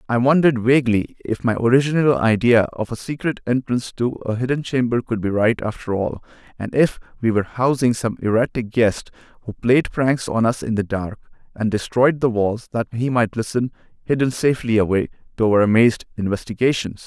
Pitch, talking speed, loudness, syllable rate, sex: 120 Hz, 180 wpm, -19 LUFS, 5.5 syllables/s, male